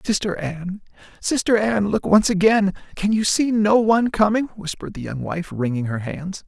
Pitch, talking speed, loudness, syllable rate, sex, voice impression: 195 Hz, 185 wpm, -20 LUFS, 5.2 syllables/s, male, masculine, adult-like, powerful, fluent, slightly cool, unique, slightly intense